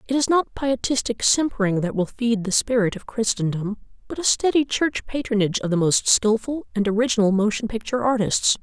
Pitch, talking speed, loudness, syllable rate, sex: 225 Hz, 180 wpm, -21 LUFS, 5.6 syllables/s, female